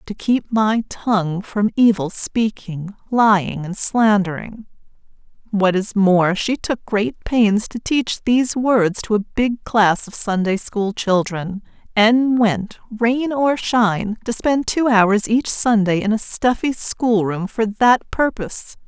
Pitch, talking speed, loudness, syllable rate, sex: 215 Hz, 155 wpm, -18 LUFS, 3.6 syllables/s, female